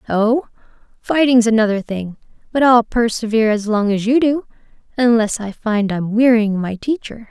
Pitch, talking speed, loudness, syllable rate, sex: 225 Hz, 155 wpm, -16 LUFS, 4.9 syllables/s, female